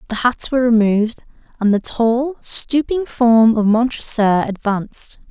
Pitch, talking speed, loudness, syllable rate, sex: 230 Hz, 135 wpm, -16 LUFS, 4.4 syllables/s, female